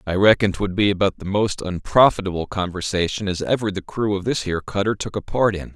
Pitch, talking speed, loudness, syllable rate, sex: 100 Hz, 220 wpm, -21 LUFS, 5.9 syllables/s, male